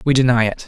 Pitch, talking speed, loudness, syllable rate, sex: 125 Hz, 265 wpm, -16 LUFS, 7.0 syllables/s, male